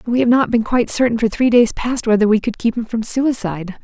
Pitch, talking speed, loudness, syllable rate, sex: 230 Hz, 265 wpm, -16 LUFS, 6.0 syllables/s, female